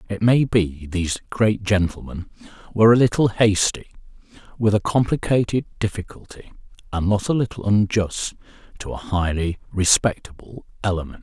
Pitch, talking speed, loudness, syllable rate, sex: 100 Hz, 130 wpm, -20 LUFS, 5.2 syllables/s, male